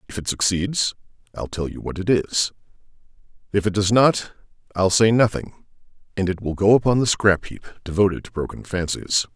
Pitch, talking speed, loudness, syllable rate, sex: 100 Hz, 180 wpm, -21 LUFS, 5.2 syllables/s, male